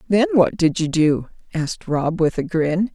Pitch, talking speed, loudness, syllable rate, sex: 180 Hz, 205 wpm, -20 LUFS, 4.5 syllables/s, female